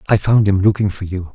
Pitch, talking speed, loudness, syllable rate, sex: 100 Hz, 265 wpm, -16 LUFS, 6.1 syllables/s, male